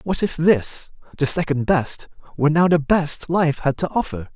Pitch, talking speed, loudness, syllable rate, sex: 155 Hz, 195 wpm, -19 LUFS, 4.6 syllables/s, male